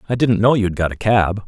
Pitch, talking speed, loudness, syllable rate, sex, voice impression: 105 Hz, 325 wpm, -17 LUFS, 6.3 syllables/s, male, very masculine, slightly middle-aged, very thick, tensed, powerful, bright, slightly soft, slightly muffled, fluent, slightly raspy, very cool, intellectual, refreshing, very sincere, calm, mature, friendly, very reassuring, unique, very elegant, slightly wild, sweet, lively, kind, slightly intense